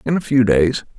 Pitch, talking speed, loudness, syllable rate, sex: 125 Hz, 245 wpm, -16 LUFS, 5.1 syllables/s, male